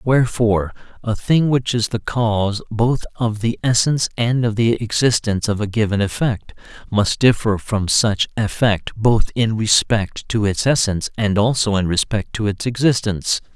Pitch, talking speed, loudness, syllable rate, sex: 110 Hz, 165 wpm, -18 LUFS, 4.8 syllables/s, male